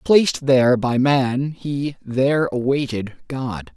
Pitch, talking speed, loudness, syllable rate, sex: 135 Hz, 130 wpm, -20 LUFS, 3.7 syllables/s, male